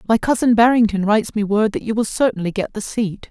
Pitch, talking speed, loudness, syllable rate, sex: 215 Hz, 235 wpm, -18 LUFS, 6.1 syllables/s, female